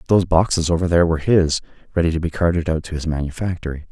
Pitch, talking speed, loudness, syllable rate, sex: 85 Hz, 215 wpm, -19 LUFS, 7.5 syllables/s, male